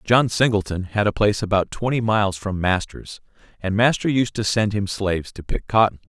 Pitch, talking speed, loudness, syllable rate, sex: 105 Hz, 195 wpm, -21 LUFS, 5.4 syllables/s, male